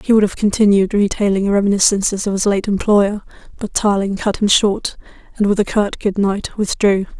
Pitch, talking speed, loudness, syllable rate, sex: 200 Hz, 185 wpm, -16 LUFS, 5.3 syllables/s, female